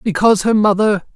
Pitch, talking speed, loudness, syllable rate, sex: 205 Hz, 155 wpm, -14 LUFS, 6.2 syllables/s, female